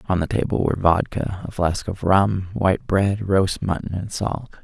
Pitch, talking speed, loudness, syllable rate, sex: 95 Hz, 195 wpm, -21 LUFS, 4.6 syllables/s, male